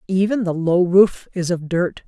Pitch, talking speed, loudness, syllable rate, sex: 180 Hz, 200 wpm, -18 LUFS, 4.4 syllables/s, female